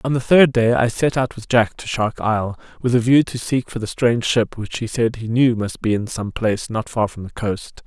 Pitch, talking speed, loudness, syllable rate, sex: 115 Hz, 275 wpm, -19 LUFS, 5.2 syllables/s, male